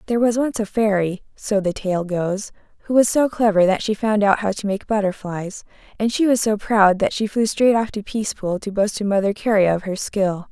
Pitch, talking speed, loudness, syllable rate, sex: 205 Hz, 235 wpm, -20 LUFS, 5.3 syllables/s, female